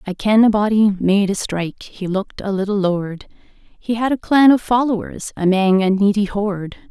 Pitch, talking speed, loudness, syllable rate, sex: 205 Hz, 190 wpm, -17 LUFS, 4.9 syllables/s, female